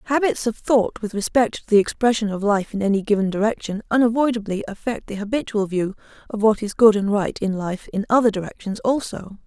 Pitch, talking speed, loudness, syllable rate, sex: 215 Hz, 195 wpm, -21 LUFS, 5.8 syllables/s, female